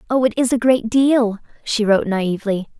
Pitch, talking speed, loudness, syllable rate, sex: 230 Hz, 195 wpm, -18 LUFS, 5.4 syllables/s, female